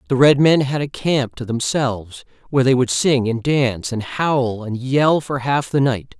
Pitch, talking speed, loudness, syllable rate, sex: 130 Hz, 225 wpm, -18 LUFS, 4.6 syllables/s, male